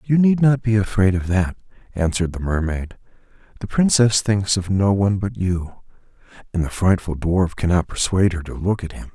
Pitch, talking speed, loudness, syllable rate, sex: 100 Hz, 190 wpm, -20 LUFS, 5.3 syllables/s, male